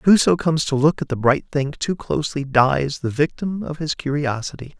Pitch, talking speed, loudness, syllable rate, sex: 145 Hz, 200 wpm, -20 LUFS, 5.1 syllables/s, male